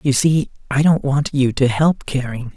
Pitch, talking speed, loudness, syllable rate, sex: 135 Hz, 190 wpm, -18 LUFS, 4.5 syllables/s, male